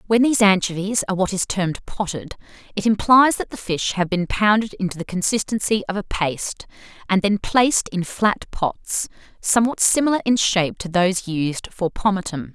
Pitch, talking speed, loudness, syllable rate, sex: 195 Hz, 175 wpm, -20 LUFS, 5.4 syllables/s, female